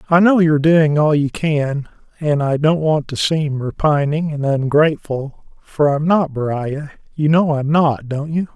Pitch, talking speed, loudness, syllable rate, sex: 150 Hz, 170 wpm, -17 LUFS, 4.3 syllables/s, male